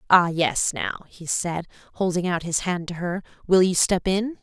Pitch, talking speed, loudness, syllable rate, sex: 180 Hz, 205 wpm, -23 LUFS, 4.4 syllables/s, female